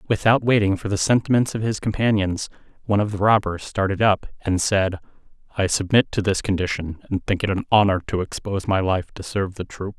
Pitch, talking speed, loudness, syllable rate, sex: 100 Hz, 205 wpm, -21 LUFS, 5.9 syllables/s, male